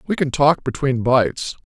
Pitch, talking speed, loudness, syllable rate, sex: 135 Hz, 180 wpm, -18 LUFS, 4.9 syllables/s, male